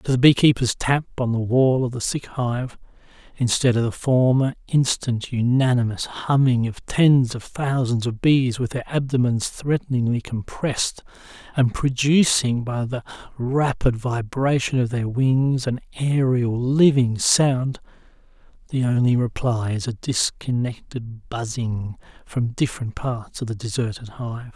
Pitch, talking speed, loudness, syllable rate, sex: 125 Hz, 135 wpm, -21 LUFS, 4.2 syllables/s, male